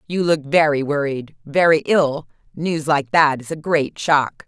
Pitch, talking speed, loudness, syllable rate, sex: 150 Hz, 175 wpm, -18 LUFS, 4.1 syllables/s, female